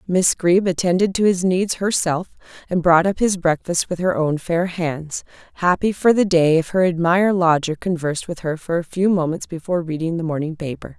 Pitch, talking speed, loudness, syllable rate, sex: 175 Hz, 200 wpm, -19 LUFS, 5.2 syllables/s, female